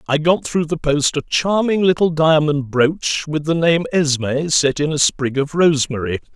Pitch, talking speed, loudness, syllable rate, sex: 155 Hz, 190 wpm, -17 LUFS, 5.4 syllables/s, male